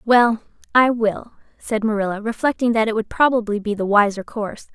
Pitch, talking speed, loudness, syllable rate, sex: 220 Hz, 175 wpm, -19 LUFS, 5.5 syllables/s, female